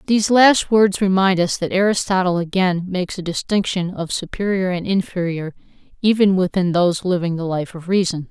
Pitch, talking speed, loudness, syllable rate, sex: 185 Hz, 165 wpm, -18 LUFS, 5.4 syllables/s, female